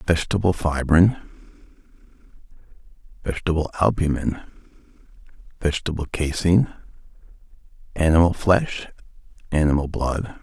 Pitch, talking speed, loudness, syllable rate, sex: 85 Hz, 60 wpm, -21 LUFS, 5.8 syllables/s, male